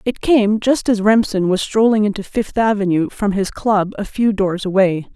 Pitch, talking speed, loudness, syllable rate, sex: 205 Hz, 200 wpm, -17 LUFS, 4.7 syllables/s, female